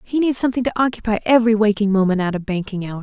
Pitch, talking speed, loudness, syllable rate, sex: 215 Hz, 240 wpm, -18 LUFS, 7.3 syllables/s, female